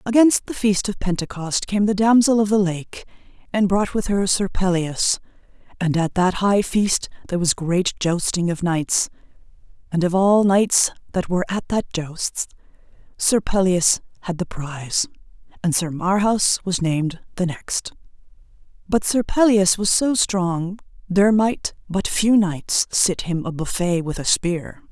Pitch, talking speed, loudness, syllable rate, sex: 190 Hz, 160 wpm, -20 LUFS, 4.3 syllables/s, female